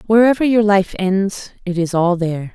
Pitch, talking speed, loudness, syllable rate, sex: 195 Hz, 190 wpm, -16 LUFS, 4.9 syllables/s, female